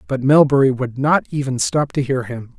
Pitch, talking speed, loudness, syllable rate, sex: 135 Hz, 210 wpm, -17 LUFS, 5.1 syllables/s, male